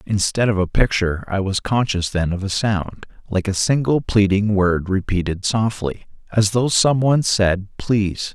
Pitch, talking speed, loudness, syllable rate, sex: 100 Hz, 165 wpm, -19 LUFS, 4.6 syllables/s, male